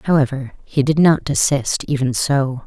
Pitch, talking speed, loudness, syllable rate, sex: 140 Hz, 160 wpm, -17 LUFS, 4.4 syllables/s, female